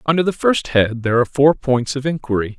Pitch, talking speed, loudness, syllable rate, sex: 130 Hz, 230 wpm, -17 LUFS, 6.1 syllables/s, male